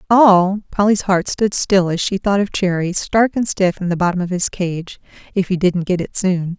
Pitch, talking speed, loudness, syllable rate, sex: 185 Hz, 230 wpm, -17 LUFS, 4.7 syllables/s, female